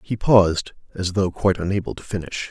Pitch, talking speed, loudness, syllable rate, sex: 95 Hz, 190 wpm, -21 LUFS, 5.9 syllables/s, male